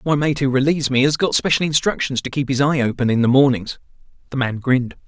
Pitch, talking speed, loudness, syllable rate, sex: 135 Hz, 235 wpm, -18 LUFS, 6.4 syllables/s, male